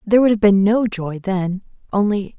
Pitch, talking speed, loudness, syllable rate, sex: 200 Hz, 200 wpm, -18 LUFS, 5.1 syllables/s, female